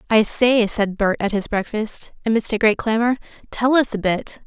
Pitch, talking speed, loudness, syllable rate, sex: 220 Hz, 200 wpm, -19 LUFS, 4.9 syllables/s, female